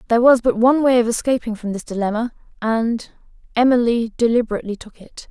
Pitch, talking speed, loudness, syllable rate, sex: 235 Hz, 160 wpm, -18 LUFS, 6.4 syllables/s, female